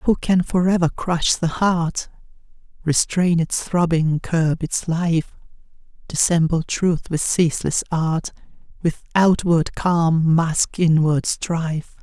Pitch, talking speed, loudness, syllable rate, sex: 165 Hz, 120 wpm, -20 LUFS, 3.5 syllables/s, female